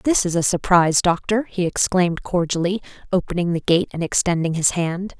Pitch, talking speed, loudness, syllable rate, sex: 180 Hz, 175 wpm, -20 LUFS, 5.4 syllables/s, female